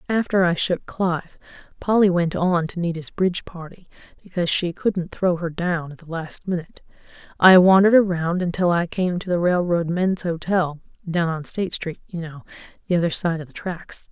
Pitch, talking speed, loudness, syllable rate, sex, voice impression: 175 Hz, 180 wpm, -21 LUFS, 5.2 syllables/s, female, feminine, slightly intellectual, calm, slightly elegant, slightly sweet